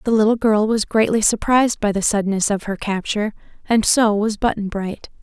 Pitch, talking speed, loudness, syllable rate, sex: 215 Hz, 195 wpm, -18 LUFS, 5.5 syllables/s, female